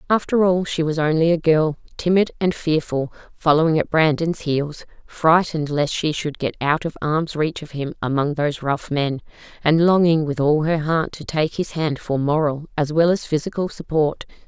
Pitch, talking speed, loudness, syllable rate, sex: 155 Hz, 190 wpm, -20 LUFS, 4.8 syllables/s, female